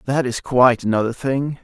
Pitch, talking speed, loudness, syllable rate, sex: 125 Hz, 185 wpm, -18 LUFS, 5.4 syllables/s, male